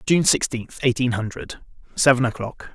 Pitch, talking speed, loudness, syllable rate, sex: 125 Hz, 130 wpm, -21 LUFS, 4.4 syllables/s, male